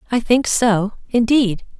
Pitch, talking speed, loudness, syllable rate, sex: 225 Hz, 135 wpm, -17 LUFS, 3.9 syllables/s, female